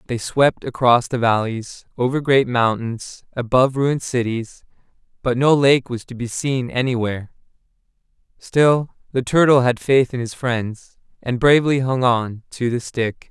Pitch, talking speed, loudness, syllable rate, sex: 125 Hz, 150 wpm, -19 LUFS, 4.3 syllables/s, male